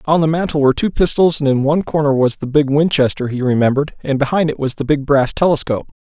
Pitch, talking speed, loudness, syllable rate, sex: 145 Hz, 240 wpm, -16 LUFS, 6.6 syllables/s, male